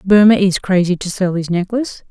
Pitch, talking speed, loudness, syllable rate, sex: 190 Hz, 200 wpm, -15 LUFS, 5.6 syllables/s, female